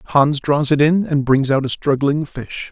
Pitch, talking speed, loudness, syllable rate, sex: 140 Hz, 220 wpm, -17 LUFS, 4.6 syllables/s, male